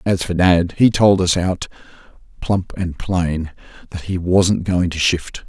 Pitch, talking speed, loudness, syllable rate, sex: 90 Hz, 175 wpm, -17 LUFS, 3.9 syllables/s, male